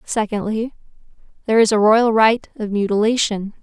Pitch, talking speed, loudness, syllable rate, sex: 220 Hz, 130 wpm, -17 LUFS, 5.2 syllables/s, female